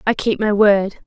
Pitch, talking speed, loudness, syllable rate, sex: 205 Hz, 225 wpm, -16 LUFS, 4.8 syllables/s, female